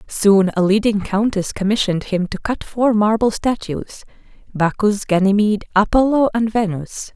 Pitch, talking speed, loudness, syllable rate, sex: 205 Hz, 125 wpm, -17 LUFS, 4.8 syllables/s, female